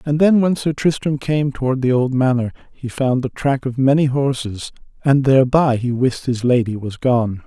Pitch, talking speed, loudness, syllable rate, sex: 130 Hz, 200 wpm, -17 LUFS, 4.8 syllables/s, male